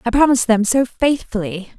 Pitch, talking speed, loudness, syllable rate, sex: 230 Hz, 170 wpm, -17 LUFS, 5.4 syllables/s, female